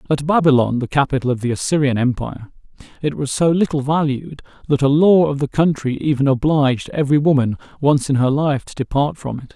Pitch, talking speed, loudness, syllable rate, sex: 140 Hz, 195 wpm, -17 LUFS, 5.9 syllables/s, male